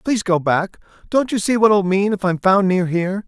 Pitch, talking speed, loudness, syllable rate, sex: 195 Hz, 255 wpm, -17 LUFS, 5.6 syllables/s, male